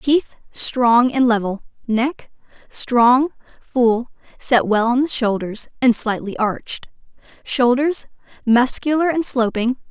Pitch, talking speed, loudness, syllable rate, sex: 245 Hz, 95 wpm, -18 LUFS, 3.7 syllables/s, female